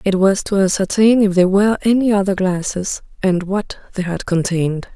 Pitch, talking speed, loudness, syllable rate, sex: 195 Hz, 180 wpm, -17 LUFS, 5.4 syllables/s, female